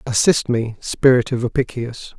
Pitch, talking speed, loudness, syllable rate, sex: 120 Hz, 135 wpm, -18 LUFS, 4.6 syllables/s, male